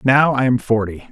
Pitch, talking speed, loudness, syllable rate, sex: 120 Hz, 215 wpm, -17 LUFS, 5.0 syllables/s, male